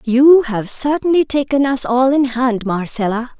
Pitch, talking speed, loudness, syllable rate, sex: 255 Hz, 160 wpm, -15 LUFS, 4.4 syllables/s, female